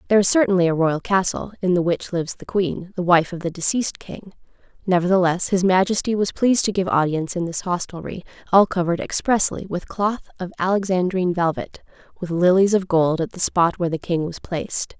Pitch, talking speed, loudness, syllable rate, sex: 180 Hz, 195 wpm, -20 LUFS, 5.9 syllables/s, female